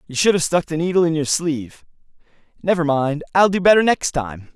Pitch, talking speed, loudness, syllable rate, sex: 160 Hz, 210 wpm, -18 LUFS, 5.8 syllables/s, male